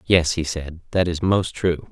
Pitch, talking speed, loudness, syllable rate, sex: 85 Hz, 220 wpm, -22 LUFS, 4.1 syllables/s, male